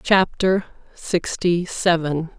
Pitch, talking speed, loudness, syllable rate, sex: 175 Hz, 75 wpm, -21 LUFS, 3.1 syllables/s, female